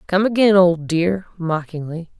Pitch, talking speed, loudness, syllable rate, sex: 180 Hz, 135 wpm, -18 LUFS, 4.2 syllables/s, female